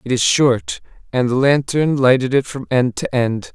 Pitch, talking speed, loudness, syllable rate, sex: 130 Hz, 205 wpm, -17 LUFS, 4.5 syllables/s, male